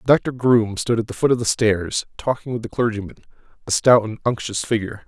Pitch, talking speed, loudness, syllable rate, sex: 115 Hz, 215 wpm, -20 LUFS, 5.9 syllables/s, male